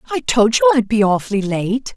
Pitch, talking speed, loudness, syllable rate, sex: 230 Hz, 215 wpm, -16 LUFS, 5.7 syllables/s, female